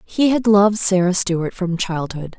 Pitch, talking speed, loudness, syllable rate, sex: 190 Hz, 175 wpm, -17 LUFS, 4.4 syllables/s, female